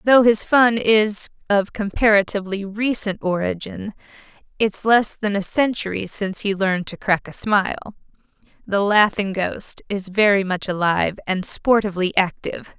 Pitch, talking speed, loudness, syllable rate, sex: 205 Hz, 130 wpm, -20 LUFS, 4.8 syllables/s, female